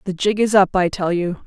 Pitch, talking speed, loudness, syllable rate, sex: 190 Hz, 285 wpm, -18 LUFS, 5.5 syllables/s, female